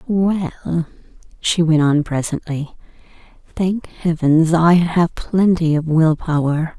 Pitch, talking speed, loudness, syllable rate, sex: 165 Hz, 115 wpm, -17 LUFS, 3.7 syllables/s, female